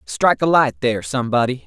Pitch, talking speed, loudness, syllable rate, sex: 125 Hz, 180 wpm, -18 LUFS, 6.4 syllables/s, male